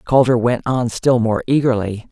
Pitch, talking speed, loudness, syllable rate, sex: 120 Hz, 170 wpm, -17 LUFS, 4.8 syllables/s, female